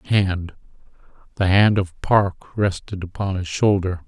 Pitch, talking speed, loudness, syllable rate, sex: 95 Hz, 145 wpm, -20 LUFS, 4.2 syllables/s, male